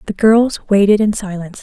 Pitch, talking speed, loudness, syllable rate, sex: 205 Hz, 185 wpm, -13 LUFS, 5.4 syllables/s, female